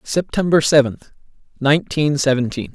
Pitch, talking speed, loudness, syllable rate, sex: 145 Hz, 85 wpm, -17 LUFS, 5.1 syllables/s, male